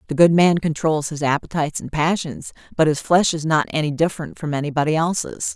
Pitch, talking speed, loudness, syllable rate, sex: 155 Hz, 195 wpm, -20 LUFS, 5.9 syllables/s, female